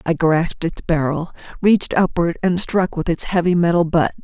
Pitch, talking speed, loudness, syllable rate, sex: 170 Hz, 185 wpm, -18 LUFS, 5.1 syllables/s, female